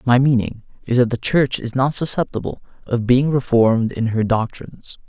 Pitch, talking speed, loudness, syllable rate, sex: 125 Hz, 175 wpm, -18 LUFS, 5.2 syllables/s, male